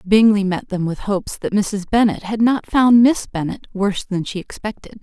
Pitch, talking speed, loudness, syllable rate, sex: 205 Hz, 205 wpm, -18 LUFS, 5.0 syllables/s, female